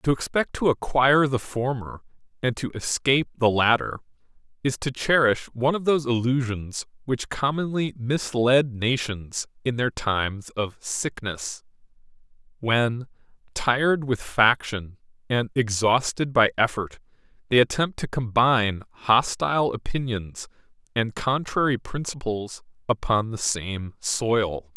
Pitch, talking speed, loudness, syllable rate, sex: 120 Hz, 115 wpm, -24 LUFS, 4.2 syllables/s, male